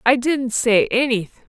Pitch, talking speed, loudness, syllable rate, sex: 245 Hz, 155 wpm, -18 LUFS, 4.4 syllables/s, female